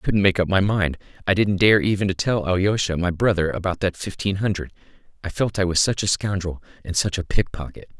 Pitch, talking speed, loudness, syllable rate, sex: 95 Hz, 225 wpm, -21 LUFS, 5.9 syllables/s, male